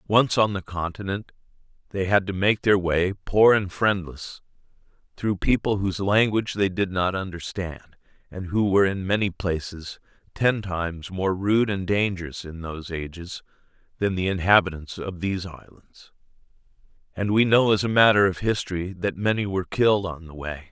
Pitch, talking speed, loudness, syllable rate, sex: 95 Hz, 165 wpm, -23 LUFS, 5.1 syllables/s, male